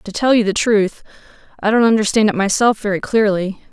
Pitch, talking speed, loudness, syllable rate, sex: 210 Hz, 195 wpm, -16 LUFS, 5.6 syllables/s, female